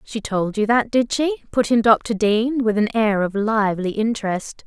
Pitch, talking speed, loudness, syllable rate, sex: 220 Hz, 205 wpm, -20 LUFS, 4.5 syllables/s, female